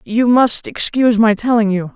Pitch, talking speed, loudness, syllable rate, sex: 225 Hz, 185 wpm, -14 LUFS, 4.9 syllables/s, female